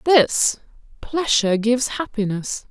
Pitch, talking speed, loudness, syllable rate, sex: 240 Hz, 65 wpm, -20 LUFS, 4.2 syllables/s, female